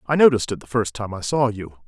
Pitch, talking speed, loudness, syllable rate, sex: 115 Hz, 290 wpm, -21 LUFS, 6.6 syllables/s, male